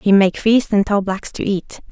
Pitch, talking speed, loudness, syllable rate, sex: 200 Hz, 250 wpm, -17 LUFS, 4.4 syllables/s, female